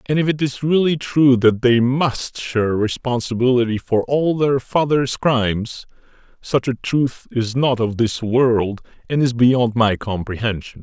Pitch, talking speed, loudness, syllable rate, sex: 125 Hz, 160 wpm, -18 LUFS, 4.2 syllables/s, male